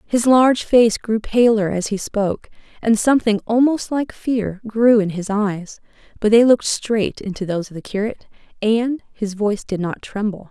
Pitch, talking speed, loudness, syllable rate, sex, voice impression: 215 Hz, 185 wpm, -18 LUFS, 4.9 syllables/s, female, very feminine, young, slightly adult-like, very thin, slightly relaxed, slightly weak, very bright, soft, clear, fluent, very cute, intellectual, very refreshing, sincere, calm, friendly, reassuring, unique, elegant, slightly wild, sweet, lively, kind, slightly intense, slightly sharp, slightly light